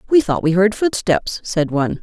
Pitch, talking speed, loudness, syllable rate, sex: 195 Hz, 205 wpm, -17 LUFS, 5.0 syllables/s, female